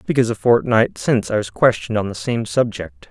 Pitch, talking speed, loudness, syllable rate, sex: 110 Hz, 210 wpm, -18 LUFS, 6.1 syllables/s, male